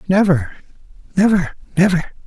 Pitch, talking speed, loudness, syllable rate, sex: 180 Hz, 80 wpm, -17 LUFS, 5.3 syllables/s, male